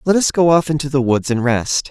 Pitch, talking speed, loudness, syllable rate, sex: 140 Hz, 285 wpm, -16 LUFS, 5.6 syllables/s, male